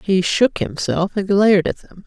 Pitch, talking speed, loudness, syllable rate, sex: 190 Hz, 205 wpm, -17 LUFS, 4.6 syllables/s, female